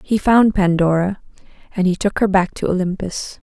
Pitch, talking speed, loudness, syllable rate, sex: 190 Hz, 170 wpm, -17 LUFS, 5.0 syllables/s, female